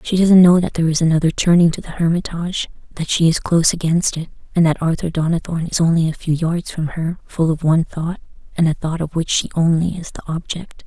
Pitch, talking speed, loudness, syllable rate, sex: 165 Hz, 230 wpm, -17 LUFS, 6.1 syllables/s, female